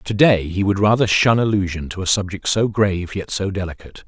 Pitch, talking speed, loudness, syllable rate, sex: 100 Hz, 220 wpm, -18 LUFS, 5.7 syllables/s, male